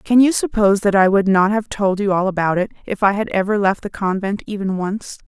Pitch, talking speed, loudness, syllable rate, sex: 200 Hz, 250 wpm, -18 LUFS, 5.7 syllables/s, female